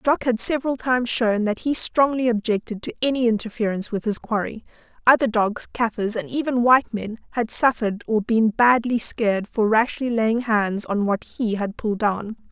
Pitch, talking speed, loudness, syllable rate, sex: 225 Hz, 180 wpm, -21 LUFS, 5.2 syllables/s, female